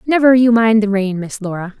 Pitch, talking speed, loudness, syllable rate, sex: 215 Hz, 235 wpm, -14 LUFS, 5.4 syllables/s, female